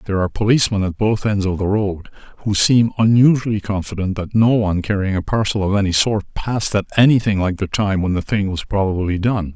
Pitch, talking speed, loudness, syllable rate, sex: 100 Hz, 215 wpm, -18 LUFS, 5.9 syllables/s, male